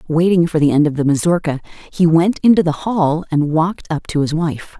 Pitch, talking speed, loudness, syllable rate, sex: 160 Hz, 225 wpm, -16 LUFS, 5.4 syllables/s, female